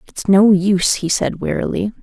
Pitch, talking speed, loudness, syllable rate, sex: 195 Hz, 180 wpm, -16 LUFS, 5.0 syllables/s, female